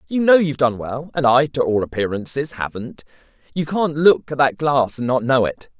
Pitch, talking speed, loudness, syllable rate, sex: 140 Hz, 215 wpm, -18 LUFS, 5.1 syllables/s, male